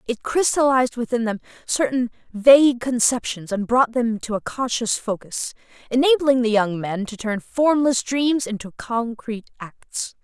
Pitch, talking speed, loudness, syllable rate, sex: 240 Hz, 145 wpm, -21 LUFS, 4.5 syllables/s, female